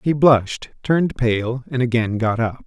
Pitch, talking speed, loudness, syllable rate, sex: 125 Hz, 180 wpm, -19 LUFS, 4.6 syllables/s, male